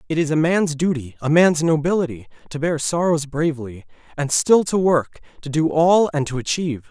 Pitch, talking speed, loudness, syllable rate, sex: 155 Hz, 190 wpm, -19 LUFS, 5.4 syllables/s, male